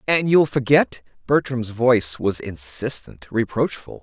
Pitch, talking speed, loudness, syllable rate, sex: 120 Hz, 120 wpm, -20 LUFS, 4.1 syllables/s, male